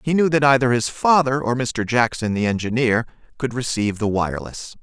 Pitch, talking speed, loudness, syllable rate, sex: 125 Hz, 185 wpm, -20 LUFS, 5.5 syllables/s, male